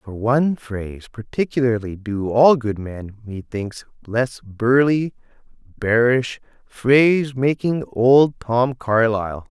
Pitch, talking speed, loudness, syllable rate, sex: 120 Hz, 105 wpm, -19 LUFS, 3.6 syllables/s, male